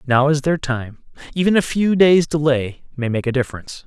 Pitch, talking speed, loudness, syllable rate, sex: 140 Hz, 200 wpm, -18 LUFS, 5.3 syllables/s, male